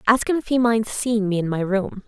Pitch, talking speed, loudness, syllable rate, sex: 220 Hz, 290 wpm, -21 LUFS, 5.2 syllables/s, female